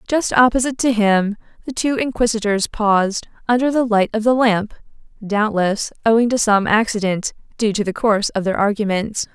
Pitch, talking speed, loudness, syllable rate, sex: 220 Hz, 160 wpm, -18 LUFS, 5.2 syllables/s, female